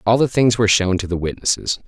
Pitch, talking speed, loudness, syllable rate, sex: 105 Hz, 255 wpm, -18 LUFS, 6.4 syllables/s, male